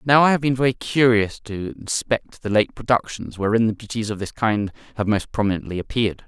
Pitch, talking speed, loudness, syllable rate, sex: 110 Hz, 200 wpm, -21 LUFS, 5.6 syllables/s, male